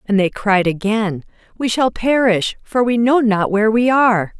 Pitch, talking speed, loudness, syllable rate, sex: 220 Hz, 190 wpm, -16 LUFS, 4.6 syllables/s, female